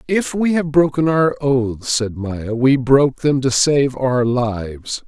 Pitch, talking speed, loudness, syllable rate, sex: 130 Hz, 175 wpm, -17 LUFS, 3.7 syllables/s, male